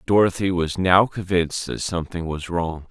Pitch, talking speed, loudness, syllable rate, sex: 90 Hz, 165 wpm, -22 LUFS, 5.1 syllables/s, male